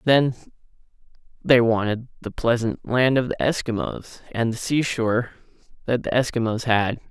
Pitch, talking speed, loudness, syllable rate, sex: 120 Hz, 135 wpm, -22 LUFS, 4.8 syllables/s, male